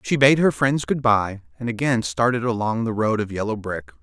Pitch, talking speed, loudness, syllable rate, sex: 115 Hz, 225 wpm, -21 LUFS, 5.1 syllables/s, male